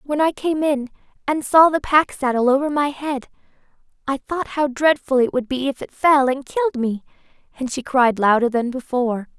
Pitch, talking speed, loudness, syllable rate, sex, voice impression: 270 Hz, 200 wpm, -19 LUFS, 5.1 syllables/s, female, gender-neutral, tensed, slightly bright, soft, fluent, intellectual, calm, friendly, elegant, slightly lively, kind, modest